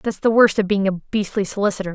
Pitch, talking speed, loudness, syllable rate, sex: 200 Hz, 245 wpm, -19 LUFS, 6.3 syllables/s, female